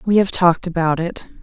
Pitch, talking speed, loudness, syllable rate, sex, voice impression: 175 Hz, 210 wpm, -17 LUFS, 5.7 syllables/s, female, very feminine, very adult-like, middle-aged, slightly thin, slightly relaxed, slightly weak, slightly bright, hard, clear, slightly fluent, cool, very intellectual, refreshing, very sincere, very calm, friendly, reassuring, slightly unique, very elegant, slightly wild, sweet, slightly strict, slightly sharp, slightly modest